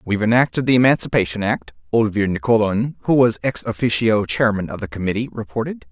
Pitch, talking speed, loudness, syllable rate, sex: 110 Hz, 160 wpm, -19 LUFS, 6.1 syllables/s, male